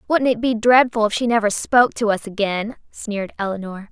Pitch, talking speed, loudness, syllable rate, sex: 220 Hz, 200 wpm, -19 LUFS, 5.6 syllables/s, female